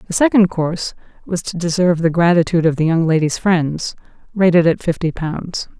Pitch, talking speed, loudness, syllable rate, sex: 170 Hz, 175 wpm, -17 LUFS, 5.5 syllables/s, female